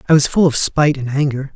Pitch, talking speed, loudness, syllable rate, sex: 140 Hz, 270 wpm, -15 LUFS, 6.6 syllables/s, male